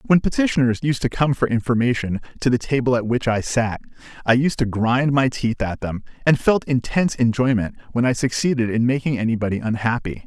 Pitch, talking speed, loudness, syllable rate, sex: 125 Hz, 195 wpm, -20 LUFS, 5.7 syllables/s, male